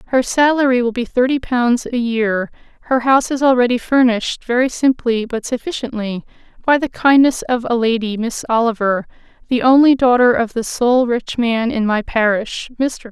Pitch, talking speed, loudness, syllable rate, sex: 240 Hz, 165 wpm, -16 LUFS, 5.0 syllables/s, female